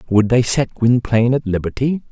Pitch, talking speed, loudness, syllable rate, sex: 120 Hz, 170 wpm, -17 LUFS, 5.4 syllables/s, male